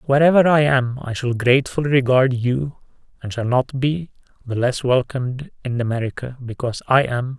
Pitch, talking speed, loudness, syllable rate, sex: 130 Hz, 165 wpm, -19 LUFS, 5.2 syllables/s, male